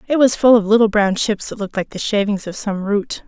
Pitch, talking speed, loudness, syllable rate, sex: 210 Hz, 275 wpm, -17 LUFS, 5.8 syllables/s, female